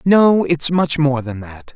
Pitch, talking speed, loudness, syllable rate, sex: 150 Hz, 205 wpm, -15 LUFS, 3.6 syllables/s, male